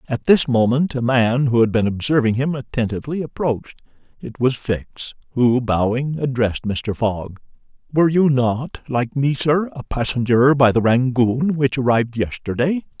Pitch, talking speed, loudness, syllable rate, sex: 125 Hz, 155 wpm, -19 LUFS, 4.7 syllables/s, male